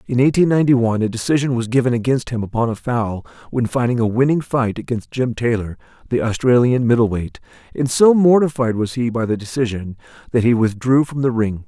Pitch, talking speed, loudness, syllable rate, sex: 120 Hz, 200 wpm, -18 LUFS, 5.9 syllables/s, male